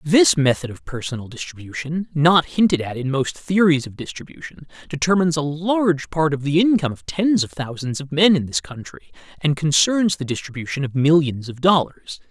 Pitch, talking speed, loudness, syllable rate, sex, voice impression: 155 Hz, 180 wpm, -19 LUFS, 5.4 syllables/s, male, masculine, adult-like, slightly middle-aged, slightly thick, tensed, slightly powerful, very bright, slightly hard, very clear, fluent, slightly cool, very intellectual, refreshing, sincere, calm, slightly mature, slightly friendly, reassuring, unique, elegant, slightly sweet, slightly lively, slightly strict, slightly sharp